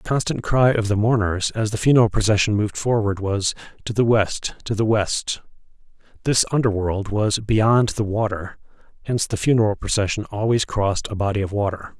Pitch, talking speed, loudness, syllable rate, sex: 105 Hz, 180 wpm, -21 LUFS, 5.4 syllables/s, male